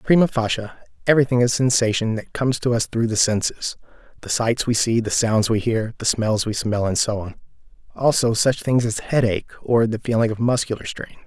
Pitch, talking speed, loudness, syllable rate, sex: 115 Hz, 200 wpm, -20 LUFS, 5.7 syllables/s, male